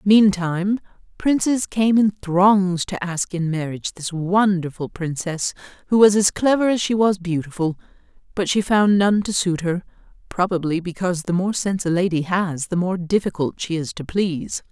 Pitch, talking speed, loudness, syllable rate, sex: 185 Hz, 170 wpm, -20 LUFS, 4.9 syllables/s, female